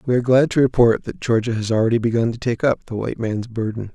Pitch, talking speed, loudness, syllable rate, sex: 115 Hz, 260 wpm, -19 LUFS, 6.5 syllables/s, male